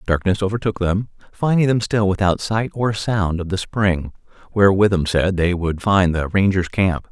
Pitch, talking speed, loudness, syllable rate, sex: 95 Hz, 185 wpm, -19 LUFS, 4.7 syllables/s, male